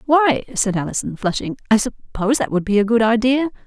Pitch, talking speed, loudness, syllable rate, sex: 230 Hz, 195 wpm, -18 LUFS, 5.7 syllables/s, female